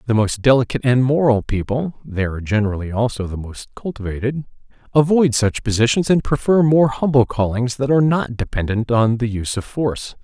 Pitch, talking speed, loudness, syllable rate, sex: 120 Hz, 175 wpm, -18 LUFS, 4.4 syllables/s, male